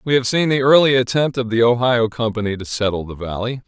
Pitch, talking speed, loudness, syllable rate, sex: 120 Hz, 230 wpm, -17 LUFS, 5.9 syllables/s, male